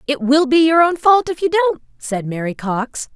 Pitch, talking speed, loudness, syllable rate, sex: 290 Hz, 230 wpm, -16 LUFS, 4.6 syllables/s, female